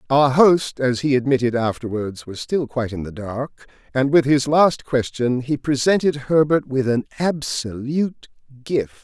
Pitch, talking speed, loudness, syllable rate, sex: 135 Hz, 160 wpm, -20 LUFS, 4.6 syllables/s, male